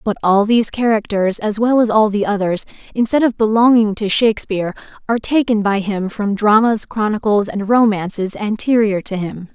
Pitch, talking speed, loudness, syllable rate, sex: 210 Hz, 170 wpm, -16 LUFS, 5.3 syllables/s, female